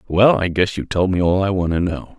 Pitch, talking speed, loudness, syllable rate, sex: 95 Hz, 300 wpm, -18 LUFS, 5.9 syllables/s, male